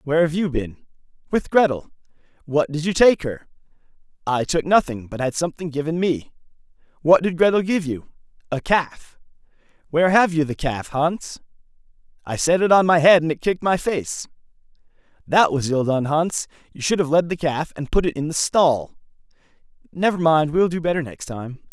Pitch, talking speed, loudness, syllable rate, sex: 160 Hz, 185 wpm, -20 LUFS, 5.2 syllables/s, male